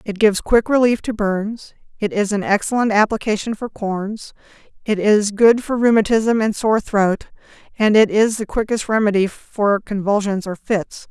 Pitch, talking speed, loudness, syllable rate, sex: 210 Hz, 170 wpm, -18 LUFS, 4.6 syllables/s, female